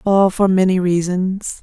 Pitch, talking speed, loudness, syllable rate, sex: 185 Hz, 110 wpm, -16 LUFS, 3.5 syllables/s, female